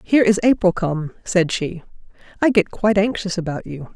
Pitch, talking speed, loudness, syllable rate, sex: 190 Hz, 180 wpm, -19 LUFS, 5.4 syllables/s, female